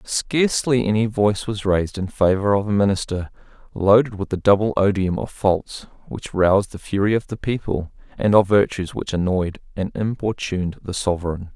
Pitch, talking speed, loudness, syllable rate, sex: 100 Hz, 170 wpm, -20 LUFS, 5.2 syllables/s, male